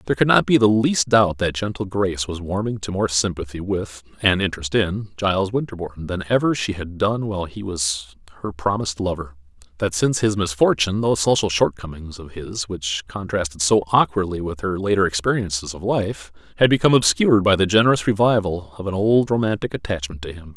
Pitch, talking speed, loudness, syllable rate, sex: 95 Hz, 190 wpm, -20 LUFS, 5.8 syllables/s, male